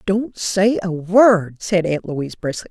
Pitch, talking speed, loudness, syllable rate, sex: 185 Hz, 180 wpm, -18 LUFS, 3.9 syllables/s, female